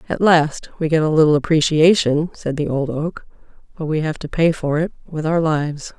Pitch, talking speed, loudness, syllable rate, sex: 155 Hz, 210 wpm, -18 LUFS, 5.2 syllables/s, female